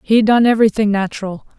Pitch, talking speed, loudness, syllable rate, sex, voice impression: 215 Hz, 150 wpm, -14 LUFS, 6.5 syllables/s, female, feminine, adult-like, sincere, slightly calm